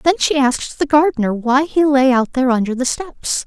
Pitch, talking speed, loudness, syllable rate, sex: 270 Hz, 225 wpm, -16 LUFS, 5.3 syllables/s, female